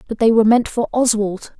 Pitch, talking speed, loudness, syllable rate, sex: 225 Hz, 225 wpm, -16 LUFS, 5.9 syllables/s, female